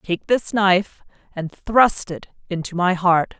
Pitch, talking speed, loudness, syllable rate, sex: 185 Hz, 160 wpm, -19 LUFS, 4.0 syllables/s, female